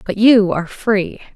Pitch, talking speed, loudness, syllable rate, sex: 200 Hz, 175 wpm, -15 LUFS, 4.4 syllables/s, female